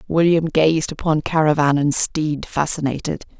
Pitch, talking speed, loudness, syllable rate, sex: 155 Hz, 125 wpm, -18 LUFS, 4.5 syllables/s, female